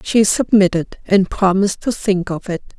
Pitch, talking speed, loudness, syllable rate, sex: 195 Hz, 170 wpm, -16 LUFS, 4.8 syllables/s, female